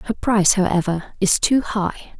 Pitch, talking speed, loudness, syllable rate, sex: 200 Hz, 165 wpm, -19 LUFS, 4.7 syllables/s, female